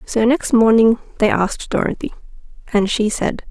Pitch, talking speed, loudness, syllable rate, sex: 225 Hz, 155 wpm, -17 LUFS, 5.0 syllables/s, female